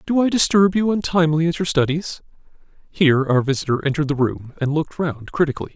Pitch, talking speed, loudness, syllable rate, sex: 155 Hz, 190 wpm, -19 LUFS, 6.5 syllables/s, male